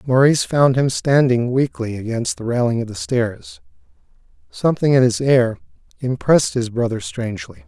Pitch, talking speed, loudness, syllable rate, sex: 125 Hz, 150 wpm, -18 LUFS, 5.1 syllables/s, male